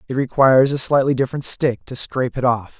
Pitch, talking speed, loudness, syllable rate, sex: 130 Hz, 215 wpm, -18 LUFS, 6.2 syllables/s, male